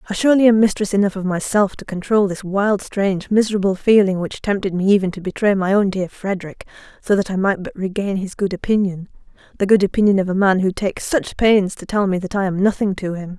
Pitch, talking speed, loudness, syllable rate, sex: 195 Hz, 230 wpm, -18 LUFS, 6.1 syllables/s, female